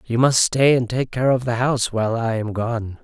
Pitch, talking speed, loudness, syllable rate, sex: 120 Hz, 255 wpm, -19 LUFS, 5.1 syllables/s, male